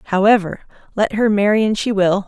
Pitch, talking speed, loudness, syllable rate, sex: 205 Hz, 185 wpm, -16 LUFS, 5.7 syllables/s, female